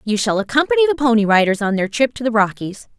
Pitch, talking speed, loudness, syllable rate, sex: 230 Hz, 240 wpm, -16 LUFS, 6.4 syllables/s, female